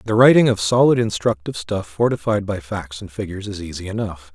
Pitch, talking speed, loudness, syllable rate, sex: 100 Hz, 195 wpm, -19 LUFS, 5.9 syllables/s, male